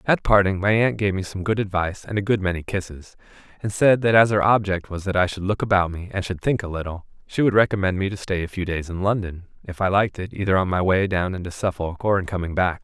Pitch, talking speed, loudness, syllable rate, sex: 95 Hz, 270 wpm, -22 LUFS, 6.3 syllables/s, male